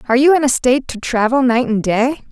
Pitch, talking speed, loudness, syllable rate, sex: 250 Hz, 260 wpm, -15 LUFS, 6.3 syllables/s, female